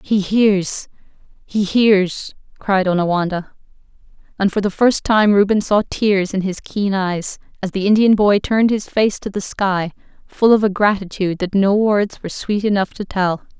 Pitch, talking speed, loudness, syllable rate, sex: 200 Hz, 175 wpm, -17 LUFS, 4.6 syllables/s, female